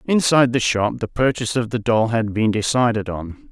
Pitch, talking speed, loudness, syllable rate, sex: 115 Hz, 205 wpm, -19 LUFS, 5.3 syllables/s, male